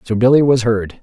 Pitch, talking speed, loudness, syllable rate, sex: 120 Hz, 235 wpm, -14 LUFS, 5.4 syllables/s, male